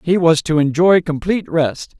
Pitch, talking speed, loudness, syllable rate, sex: 165 Hz, 180 wpm, -16 LUFS, 4.8 syllables/s, male